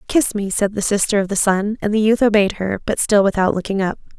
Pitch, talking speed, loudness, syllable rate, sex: 205 Hz, 260 wpm, -18 LUFS, 5.8 syllables/s, female